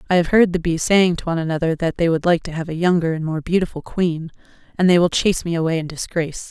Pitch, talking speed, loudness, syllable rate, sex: 170 Hz, 265 wpm, -19 LUFS, 6.7 syllables/s, female